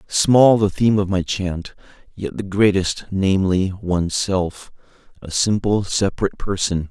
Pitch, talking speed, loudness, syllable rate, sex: 95 Hz, 130 wpm, -19 LUFS, 4.7 syllables/s, male